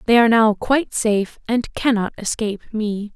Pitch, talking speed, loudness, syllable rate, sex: 220 Hz, 170 wpm, -19 LUFS, 5.7 syllables/s, female